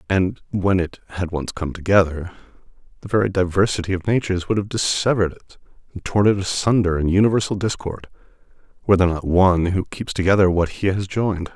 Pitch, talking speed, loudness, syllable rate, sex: 95 Hz, 175 wpm, -20 LUFS, 6.1 syllables/s, male